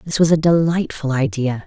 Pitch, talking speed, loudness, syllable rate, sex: 150 Hz, 180 wpm, -17 LUFS, 5.2 syllables/s, female